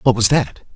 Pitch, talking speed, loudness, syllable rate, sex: 120 Hz, 235 wpm, -16 LUFS, 5.1 syllables/s, male